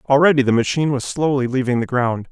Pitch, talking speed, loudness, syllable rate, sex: 130 Hz, 205 wpm, -18 LUFS, 6.3 syllables/s, male